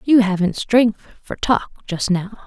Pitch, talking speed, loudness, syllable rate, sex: 210 Hz, 170 wpm, -19 LUFS, 4.0 syllables/s, female